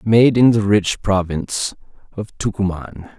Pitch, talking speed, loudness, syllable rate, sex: 105 Hz, 130 wpm, -17 LUFS, 4.1 syllables/s, male